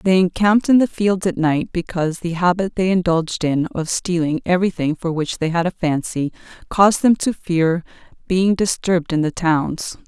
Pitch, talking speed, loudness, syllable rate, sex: 175 Hz, 185 wpm, -19 LUFS, 5.1 syllables/s, female